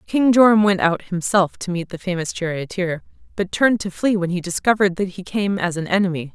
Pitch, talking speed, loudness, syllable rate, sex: 185 Hz, 220 wpm, -19 LUFS, 5.8 syllables/s, female